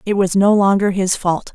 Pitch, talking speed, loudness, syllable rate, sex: 195 Hz, 230 wpm, -15 LUFS, 4.8 syllables/s, female